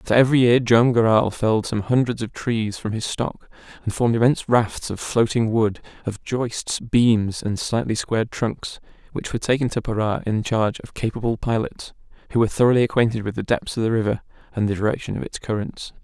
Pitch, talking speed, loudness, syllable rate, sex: 115 Hz, 200 wpm, -21 LUFS, 5.7 syllables/s, male